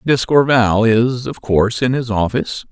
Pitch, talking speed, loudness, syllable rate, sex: 120 Hz, 155 wpm, -15 LUFS, 4.6 syllables/s, male